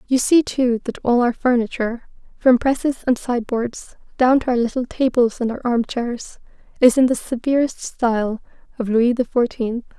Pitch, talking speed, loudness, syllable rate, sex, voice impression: 245 Hz, 175 wpm, -19 LUFS, 5.0 syllables/s, female, feminine, adult-like, relaxed, slightly weak, soft, fluent, calm, reassuring, elegant, kind, modest